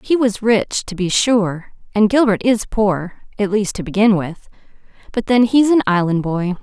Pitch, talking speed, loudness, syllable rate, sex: 210 Hz, 180 wpm, -17 LUFS, 4.4 syllables/s, female